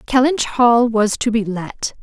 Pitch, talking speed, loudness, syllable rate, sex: 230 Hz, 175 wpm, -16 LUFS, 3.9 syllables/s, female